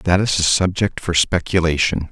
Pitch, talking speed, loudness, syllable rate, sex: 85 Hz, 170 wpm, -17 LUFS, 4.8 syllables/s, male